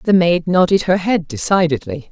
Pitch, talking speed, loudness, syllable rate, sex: 170 Hz, 170 wpm, -16 LUFS, 4.8 syllables/s, female